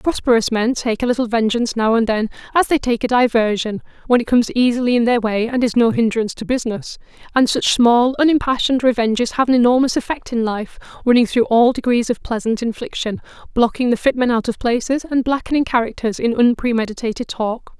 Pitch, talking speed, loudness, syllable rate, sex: 240 Hz, 195 wpm, -17 LUFS, 6.0 syllables/s, female